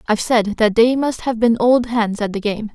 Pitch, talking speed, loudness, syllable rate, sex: 225 Hz, 260 wpm, -17 LUFS, 5.1 syllables/s, female